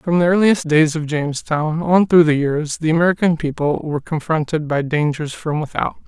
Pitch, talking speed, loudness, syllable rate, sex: 155 Hz, 190 wpm, -18 LUFS, 5.2 syllables/s, male